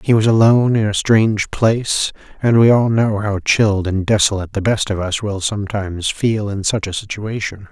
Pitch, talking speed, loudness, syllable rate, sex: 105 Hz, 200 wpm, -16 LUFS, 5.3 syllables/s, male